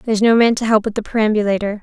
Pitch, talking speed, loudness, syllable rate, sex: 215 Hz, 265 wpm, -16 LUFS, 7.3 syllables/s, female